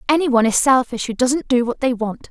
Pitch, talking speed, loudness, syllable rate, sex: 250 Hz, 260 wpm, -18 LUFS, 6.1 syllables/s, female